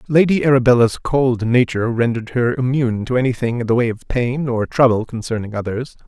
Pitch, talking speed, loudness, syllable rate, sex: 120 Hz, 180 wpm, -17 LUFS, 5.9 syllables/s, male